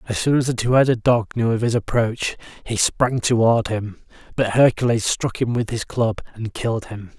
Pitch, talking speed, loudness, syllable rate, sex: 115 Hz, 210 wpm, -20 LUFS, 4.9 syllables/s, male